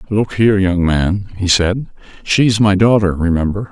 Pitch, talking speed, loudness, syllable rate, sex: 100 Hz, 180 wpm, -14 LUFS, 4.9 syllables/s, male